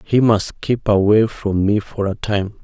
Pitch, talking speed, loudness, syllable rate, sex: 105 Hz, 205 wpm, -17 LUFS, 4.1 syllables/s, male